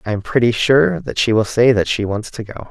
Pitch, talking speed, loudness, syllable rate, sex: 115 Hz, 290 wpm, -16 LUFS, 5.7 syllables/s, male